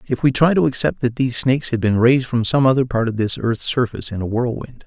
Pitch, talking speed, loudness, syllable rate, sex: 125 Hz, 270 wpm, -18 LUFS, 6.4 syllables/s, male